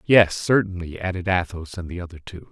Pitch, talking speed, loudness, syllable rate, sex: 90 Hz, 190 wpm, -23 LUFS, 5.6 syllables/s, male